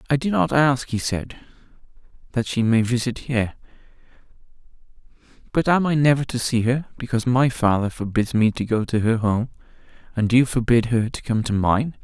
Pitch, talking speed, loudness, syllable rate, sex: 120 Hz, 180 wpm, -21 LUFS, 5.3 syllables/s, male